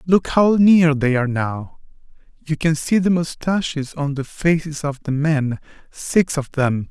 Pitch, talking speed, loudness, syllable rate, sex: 150 Hz, 165 wpm, -19 LUFS, 4.1 syllables/s, male